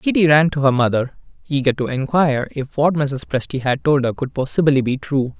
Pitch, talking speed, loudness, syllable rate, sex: 140 Hz, 210 wpm, -18 LUFS, 5.4 syllables/s, male